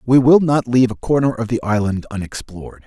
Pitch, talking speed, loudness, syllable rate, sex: 115 Hz, 210 wpm, -16 LUFS, 6.0 syllables/s, male